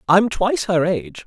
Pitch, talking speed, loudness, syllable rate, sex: 170 Hz, 190 wpm, -19 LUFS, 5.4 syllables/s, male